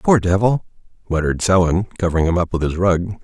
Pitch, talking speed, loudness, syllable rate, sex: 90 Hz, 185 wpm, -18 LUFS, 6.3 syllables/s, male